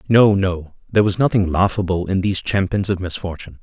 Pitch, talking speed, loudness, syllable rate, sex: 95 Hz, 180 wpm, -19 LUFS, 6.0 syllables/s, male